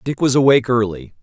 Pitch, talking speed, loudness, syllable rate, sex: 120 Hz, 195 wpm, -16 LUFS, 6.5 syllables/s, male